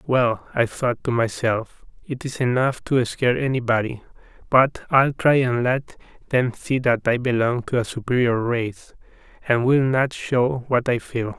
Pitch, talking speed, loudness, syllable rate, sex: 125 Hz, 170 wpm, -21 LUFS, 4.3 syllables/s, male